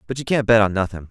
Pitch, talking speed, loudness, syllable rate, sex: 110 Hz, 325 wpm, -18 LUFS, 7.4 syllables/s, male